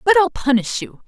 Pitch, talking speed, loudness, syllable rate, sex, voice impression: 305 Hz, 225 wpm, -18 LUFS, 5.4 syllables/s, female, very feminine, very adult-like, middle-aged, thin, tensed, powerful, very bright, very hard, very clear, very fluent, slightly raspy, slightly cute, cool, very intellectual, refreshing, sincere, calm, slightly friendly, slightly reassuring, very unique, elegant, wild, slightly sweet, very lively, very strict, intense, very sharp